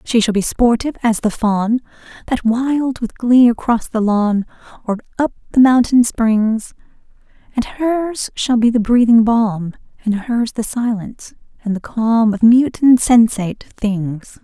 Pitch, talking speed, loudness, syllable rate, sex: 230 Hz, 155 wpm, -16 LUFS, 4.1 syllables/s, female